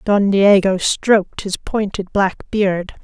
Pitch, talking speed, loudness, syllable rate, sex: 195 Hz, 140 wpm, -16 LUFS, 3.5 syllables/s, female